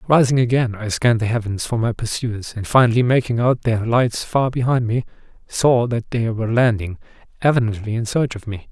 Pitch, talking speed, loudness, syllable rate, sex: 115 Hz, 195 wpm, -19 LUFS, 5.5 syllables/s, male